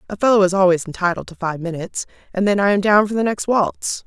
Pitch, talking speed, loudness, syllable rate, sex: 195 Hz, 250 wpm, -18 LUFS, 6.3 syllables/s, female